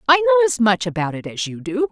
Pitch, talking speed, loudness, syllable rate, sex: 240 Hz, 280 wpm, -18 LUFS, 6.7 syllables/s, female